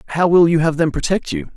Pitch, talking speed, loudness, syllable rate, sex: 155 Hz, 270 wpm, -16 LUFS, 6.6 syllables/s, male